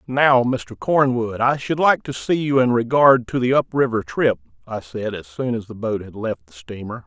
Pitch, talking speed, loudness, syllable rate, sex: 120 Hz, 230 wpm, -20 LUFS, 4.7 syllables/s, male